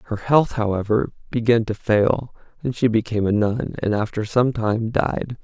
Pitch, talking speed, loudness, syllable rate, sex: 110 Hz, 175 wpm, -21 LUFS, 4.7 syllables/s, male